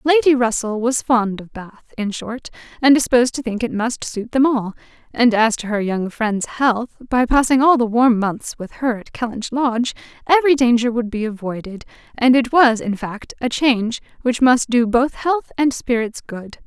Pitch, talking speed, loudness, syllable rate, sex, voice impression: 240 Hz, 200 wpm, -18 LUFS, 4.7 syllables/s, female, very feminine, slightly young, slightly adult-like, very thin, slightly tensed, slightly weak, bright, slightly soft, very clear, very fluent, cute, very intellectual, refreshing, sincere, slightly calm, friendly, slightly reassuring, very unique, very elegant, sweet, very lively, slightly strict, intense, sharp